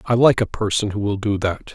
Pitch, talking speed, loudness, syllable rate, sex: 105 Hz, 275 wpm, -20 LUFS, 5.6 syllables/s, male